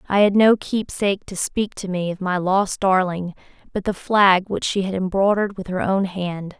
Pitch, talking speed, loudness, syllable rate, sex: 190 Hz, 210 wpm, -20 LUFS, 4.8 syllables/s, female